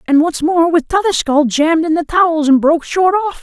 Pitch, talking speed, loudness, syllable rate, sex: 325 Hz, 230 wpm, -13 LUFS, 5.8 syllables/s, female